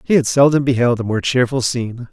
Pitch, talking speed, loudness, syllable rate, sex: 125 Hz, 225 wpm, -16 LUFS, 6.0 syllables/s, male